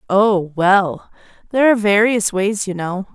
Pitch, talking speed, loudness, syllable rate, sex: 200 Hz, 155 wpm, -16 LUFS, 4.4 syllables/s, female